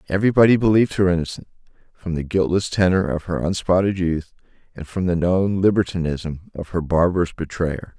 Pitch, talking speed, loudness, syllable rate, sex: 90 Hz, 165 wpm, -20 LUFS, 5.7 syllables/s, male